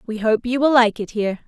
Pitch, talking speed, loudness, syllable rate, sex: 230 Hz, 285 wpm, -18 LUFS, 6.4 syllables/s, female